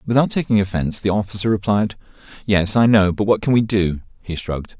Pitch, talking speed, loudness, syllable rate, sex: 100 Hz, 200 wpm, -19 LUFS, 6.0 syllables/s, male